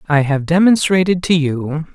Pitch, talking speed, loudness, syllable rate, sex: 160 Hz, 155 wpm, -15 LUFS, 4.6 syllables/s, male